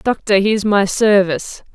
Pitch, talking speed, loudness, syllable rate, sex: 200 Hz, 140 wpm, -15 LUFS, 5.1 syllables/s, female